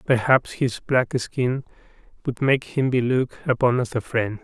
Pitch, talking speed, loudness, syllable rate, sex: 125 Hz, 175 wpm, -22 LUFS, 4.4 syllables/s, male